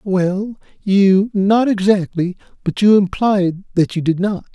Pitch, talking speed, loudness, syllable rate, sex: 195 Hz, 130 wpm, -16 LUFS, 3.7 syllables/s, male